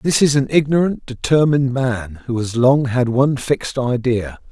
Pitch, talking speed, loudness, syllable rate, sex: 130 Hz, 175 wpm, -17 LUFS, 4.8 syllables/s, male